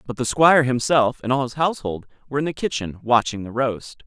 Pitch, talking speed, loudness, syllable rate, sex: 130 Hz, 220 wpm, -21 LUFS, 6.0 syllables/s, male